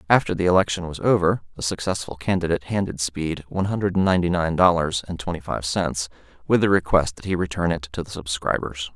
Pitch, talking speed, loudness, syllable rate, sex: 85 Hz, 195 wpm, -22 LUFS, 6.0 syllables/s, male